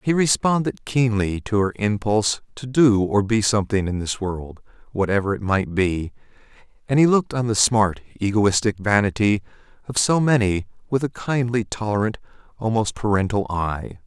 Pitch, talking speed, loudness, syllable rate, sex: 105 Hz, 155 wpm, -21 LUFS, 5.0 syllables/s, male